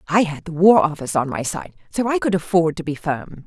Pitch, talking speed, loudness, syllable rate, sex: 170 Hz, 260 wpm, -20 LUFS, 5.7 syllables/s, female